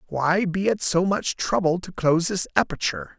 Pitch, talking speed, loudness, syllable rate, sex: 175 Hz, 190 wpm, -23 LUFS, 5.2 syllables/s, male